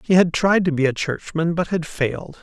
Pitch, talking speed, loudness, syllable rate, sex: 165 Hz, 245 wpm, -20 LUFS, 5.2 syllables/s, male